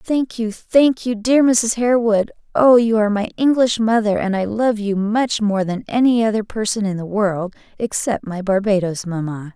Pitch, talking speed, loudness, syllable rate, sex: 215 Hz, 190 wpm, -18 LUFS, 4.8 syllables/s, female